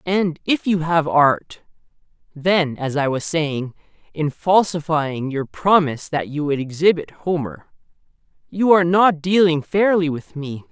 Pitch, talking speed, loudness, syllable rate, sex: 160 Hz, 145 wpm, -19 LUFS, 4.2 syllables/s, male